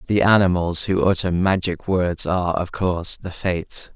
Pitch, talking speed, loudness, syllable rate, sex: 90 Hz, 165 wpm, -20 LUFS, 4.8 syllables/s, male